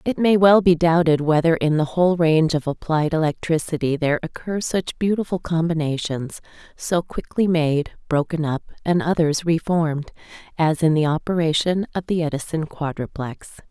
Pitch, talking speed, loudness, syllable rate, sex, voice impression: 160 Hz, 150 wpm, -20 LUFS, 5.0 syllables/s, female, very feminine, very middle-aged, thin, slightly relaxed, slightly weak, slightly dark, very soft, very clear, fluent, cute, very intellectual, very refreshing, very sincere, very calm, very friendly, very reassuring, unique, very elegant, very sweet, lively, very kind, very modest, light